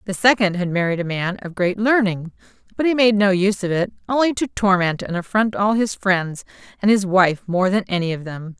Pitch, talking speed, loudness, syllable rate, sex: 195 Hz, 225 wpm, -19 LUFS, 5.4 syllables/s, female